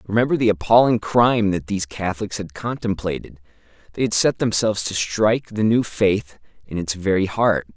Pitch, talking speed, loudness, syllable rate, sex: 100 Hz, 170 wpm, -20 LUFS, 5.5 syllables/s, male